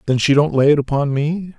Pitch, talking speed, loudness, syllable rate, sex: 145 Hz, 265 wpm, -16 LUFS, 5.7 syllables/s, male